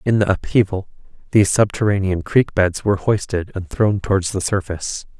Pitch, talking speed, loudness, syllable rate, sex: 100 Hz, 160 wpm, -19 LUFS, 5.5 syllables/s, male